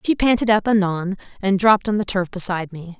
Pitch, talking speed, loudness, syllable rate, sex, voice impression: 195 Hz, 220 wpm, -19 LUFS, 6.1 syllables/s, female, feminine, adult-like, tensed, bright, clear, fluent, slightly nasal, intellectual, friendly, lively, slightly intense, light